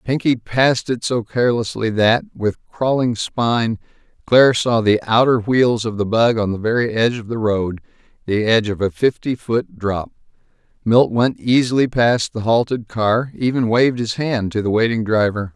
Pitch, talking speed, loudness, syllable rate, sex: 115 Hz, 170 wpm, -18 LUFS, 4.9 syllables/s, male